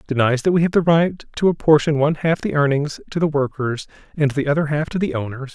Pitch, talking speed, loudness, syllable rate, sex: 145 Hz, 240 wpm, -19 LUFS, 6.2 syllables/s, male